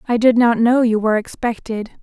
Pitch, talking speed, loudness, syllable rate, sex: 230 Hz, 210 wpm, -16 LUFS, 5.8 syllables/s, female